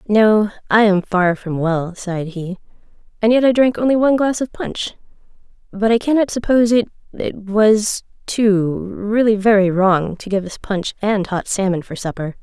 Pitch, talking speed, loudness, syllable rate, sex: 205 Hz, 170 wpm, -17 LUFS, 4.7 syllables/s, female